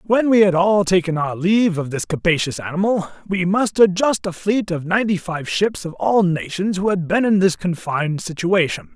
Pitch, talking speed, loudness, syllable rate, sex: 185 Hz, 200 wpm, -19 LUFS, 5.1 syllables/s, male